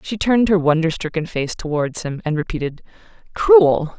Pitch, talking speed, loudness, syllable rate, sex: 175 Hz, 165 wpm, -18 LUFS, 5.1 syllables/s, female